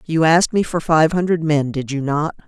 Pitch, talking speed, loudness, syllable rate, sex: 160 Hz, 240 wpm, -17 LUFS, 5.3 syllables/s, female